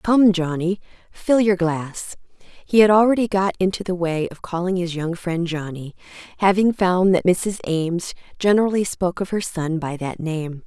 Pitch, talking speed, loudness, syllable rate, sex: 180 Hz, 175 wpm, -20 LUFS, 4.7 syllables/s, female